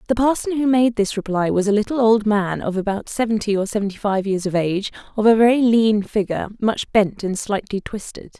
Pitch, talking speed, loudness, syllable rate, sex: 210 Hz, 215 wpm, -19 LUFS, 5.7 syllables/s, female